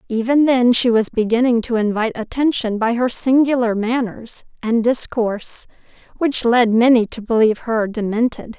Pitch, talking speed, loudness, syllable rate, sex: 235 Hz, 145 wpm, -17 LUFS, 4.9 syllables/s, female